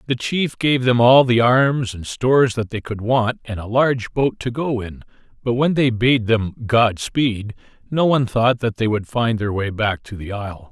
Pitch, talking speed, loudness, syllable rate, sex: 115 Hz, 225 wpm, -19 LUFS, 4.5 syllables/s, male